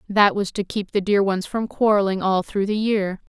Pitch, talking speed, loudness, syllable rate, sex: 200 Hz, 235 wpm, -21 LUFS, 4.8 syllables/s, female